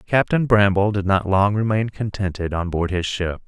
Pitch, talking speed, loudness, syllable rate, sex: 100 Hz, 190 wpm, -20 LUFS, 4.8 syllables/s, male